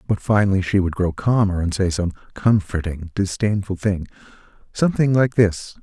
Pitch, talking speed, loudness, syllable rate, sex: 100 Hz, 145 wpm, -20 LUFS, 5.2 syllables/s, male